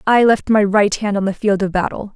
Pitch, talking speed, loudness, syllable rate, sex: 205 Hz, 280 wpm, -16 LUFS, 5.5 syllables/s, female